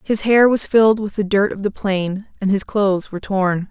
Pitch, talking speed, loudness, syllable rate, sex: 200 Hz, 245 wpm, -17 LUFS, 5.1 syllables/s, female